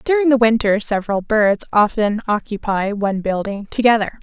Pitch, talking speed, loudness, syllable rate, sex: 215 Hz, 140 wpm, -17 LUFS, 5.3 syllables/s, female